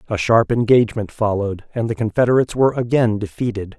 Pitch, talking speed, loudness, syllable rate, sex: 110 Hz, 160 wpm, -18 LUFS, 6.5 syllables/s, male